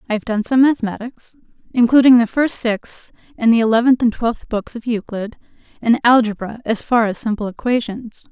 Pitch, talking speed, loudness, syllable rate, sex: 230 Hz, 175 wpm, -17 LUFS, 5.3 syllables/s, female